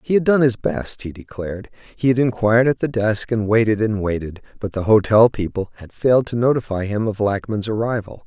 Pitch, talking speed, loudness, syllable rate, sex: 110 Hz, 210 wpm, -19 LUFS, 5.5 syllables/s, male